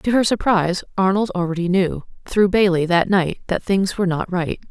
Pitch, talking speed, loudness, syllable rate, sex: 185 Hz, 190 wpm, -19 LUFS, 5.3 syllables/s, female